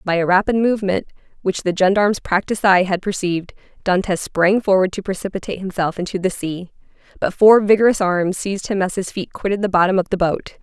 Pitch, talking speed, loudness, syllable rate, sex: 190 Hz, 200 wpm, -18 LUFS, 6.1 syllables/s, female